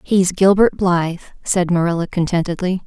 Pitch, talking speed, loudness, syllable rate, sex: 175 Hz, 125 wpm, -17 LUFS, 5.2 syllables/s, female